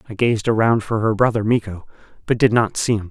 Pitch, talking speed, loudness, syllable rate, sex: 110 Hz, 230 wpm, -18 LUFS, 5.9 syllables/s, male